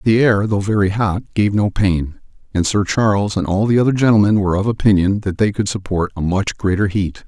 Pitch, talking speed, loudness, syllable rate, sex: 100 Hz, 225 wpm, -17 LUFS, 5.5 syllables/s, male